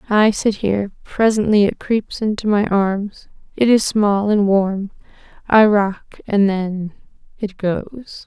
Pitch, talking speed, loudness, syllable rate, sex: 205 Hz, 145 wpm, -17 LUFS, 3.6 syllables/s, female